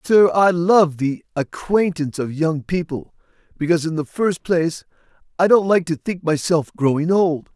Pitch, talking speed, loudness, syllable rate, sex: 165 Hz, 165 wpm, -19 LUFS, 4.7 syllables/s, male